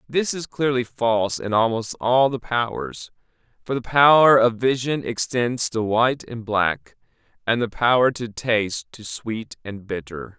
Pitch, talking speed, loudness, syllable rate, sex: 115 Hz, 160 wpm, -21 LUFS, 4.3 syllables/s, male